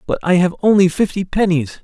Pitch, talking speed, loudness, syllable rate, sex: 175 Hz, 195 wpm, -15 LUFS, 5.7 syllables/s, male